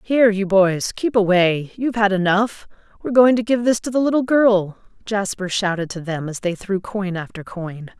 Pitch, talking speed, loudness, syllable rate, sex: 200 Hz, 205 wpm, -19 LUFS, 5.0 syllables/s, female